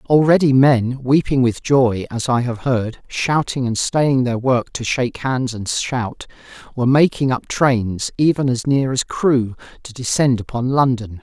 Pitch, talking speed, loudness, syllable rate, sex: 125 Hz, 170 wpm, -18 LUFS, 4.3 syllables/s, male